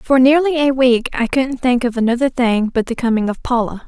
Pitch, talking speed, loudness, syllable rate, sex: 250 Hz, 230 wpm, -16 LUFS, 5.4 syllables/s, female